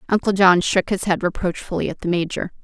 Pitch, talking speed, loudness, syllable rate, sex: 185 Hz, 205 wpm, -20 LUFS, 5.9 syllables/s, female